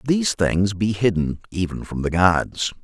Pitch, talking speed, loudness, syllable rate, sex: 95 Hz, 170 wpm, -21 LUFS, 4.5 syllables/s, male